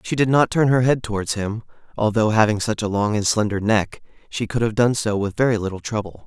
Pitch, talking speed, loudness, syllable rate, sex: 110 Hz, 240 wpm, -20 LUFS, 5.8 syllables/s, male